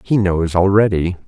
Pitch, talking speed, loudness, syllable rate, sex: 95 Hz, 140 wpm, -15 LUFS, 4.6 syllables/s, male